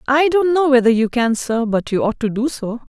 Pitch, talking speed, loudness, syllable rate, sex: 255 Hz, 265 wpm, -17 LUFS, 5.1 syllables/s, female